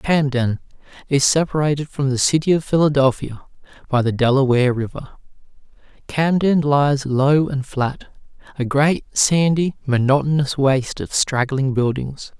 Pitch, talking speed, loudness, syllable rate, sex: 140 Hz, 115 wpm, -18 LUFS, 4.5 syllables/s, male